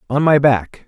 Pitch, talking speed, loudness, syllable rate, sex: 130 Hz, 205 wpm, -15 LUFS, 4.4 syllables/s, male